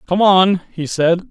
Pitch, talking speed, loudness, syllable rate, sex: 175 Hz, 185 wpm, -15 LUFS, 3.9 syllables/s, male